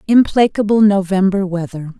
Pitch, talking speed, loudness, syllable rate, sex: 195 Hz, 90 wpm, -14 LUFS, 5.0 syllables/s, female